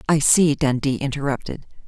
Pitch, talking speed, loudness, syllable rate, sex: 140 Hz, 130 wpm, -20 LUFS, 5.2 syllables/s, female